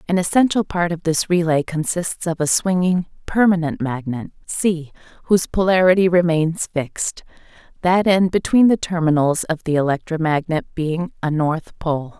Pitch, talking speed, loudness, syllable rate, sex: 170 Hz, 145 wpm, -19 LUFS, 4.8 syllables/s, female